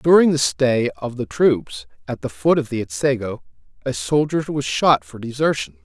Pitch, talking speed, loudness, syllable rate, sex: 125 Hz, 185 wpm, -20 LUFS, 4.7 syllables/s, male